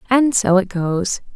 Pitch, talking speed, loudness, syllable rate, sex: 205 Hz, 175 wpm, -17 LUFS, 3.8 syllables/s, female